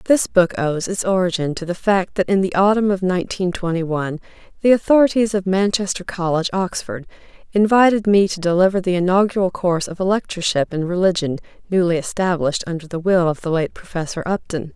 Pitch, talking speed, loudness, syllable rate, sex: 185 Hz, 180 wpm, -19 LUFS, 6.0 syllables/s, female